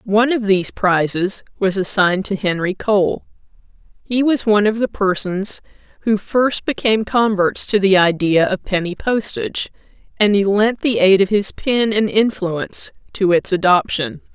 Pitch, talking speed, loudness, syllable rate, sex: 200 Hz, 160 wpm, -17 LUFS, 4.7 syllables/s, female